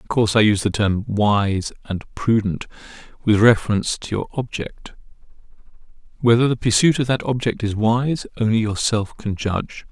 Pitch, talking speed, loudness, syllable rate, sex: 110 Hz, 155 wpm, -20 LUFS, 5.1 syllables/s, male